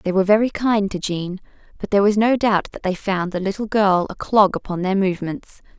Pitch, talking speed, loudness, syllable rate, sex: 195 Hz, 230 wpm, -19 LUFS, 5.6 syllables/s, female